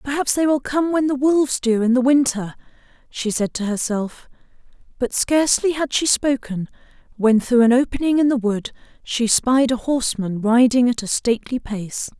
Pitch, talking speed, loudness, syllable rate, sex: 250 Hz, 175 wpm, -19 LUFS, 5.0 syllables/s, female